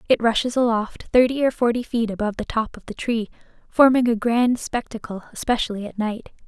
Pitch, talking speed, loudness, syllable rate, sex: 230 Hz, 185 wpm, -21 LUFS, 5.6 syllables/s, female